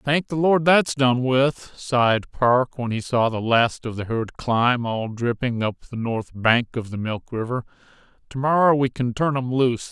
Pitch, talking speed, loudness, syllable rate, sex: 125 Hz, 205 wpm, -21 LUFS, 4.2 syllables/s, male